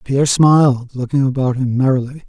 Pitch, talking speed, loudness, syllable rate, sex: 135 Hz, 160 wpm, -15 LUFS, 5.5 syllables/s, male